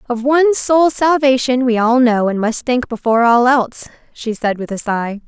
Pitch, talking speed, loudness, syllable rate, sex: 245 Hz, 205 wpm, -15 LUFS, 5.0 syllables/s, female